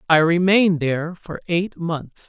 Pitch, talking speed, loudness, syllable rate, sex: 170 Hz, 160 wpm, -20 LUFS, 4.5 syllables/s, male